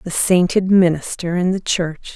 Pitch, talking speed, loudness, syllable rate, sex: 175 Hz, 165 wpm, -17 LUFS, 4.4 syllables/s, female